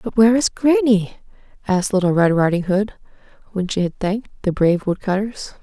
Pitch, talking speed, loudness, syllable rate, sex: 200 Hz, 180 wpm, -18 LUFS, 5.6 syllables/s, female